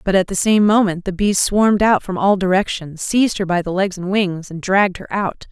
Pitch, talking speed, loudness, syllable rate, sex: 190 Hz, 250 wpm, -17 LUFS, 5.4 syllables/s, female